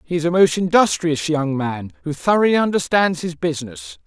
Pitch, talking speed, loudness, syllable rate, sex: 155 Hz, 175 wpm, -18 LUFS, 5.3 syllables/s, male